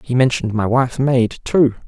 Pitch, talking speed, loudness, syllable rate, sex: 125 Hz, 190 wpm, -17 LUFS, 5.6 syllables/s, male